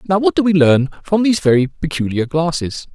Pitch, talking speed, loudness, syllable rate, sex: 165 Hz, 205 wpm, -16 LUFS, 5.6 syllables/s, male